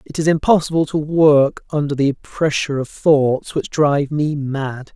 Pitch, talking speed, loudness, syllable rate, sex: 145 Hz, 170 wpm, -17 LUFS, 4.4 syllables/s, male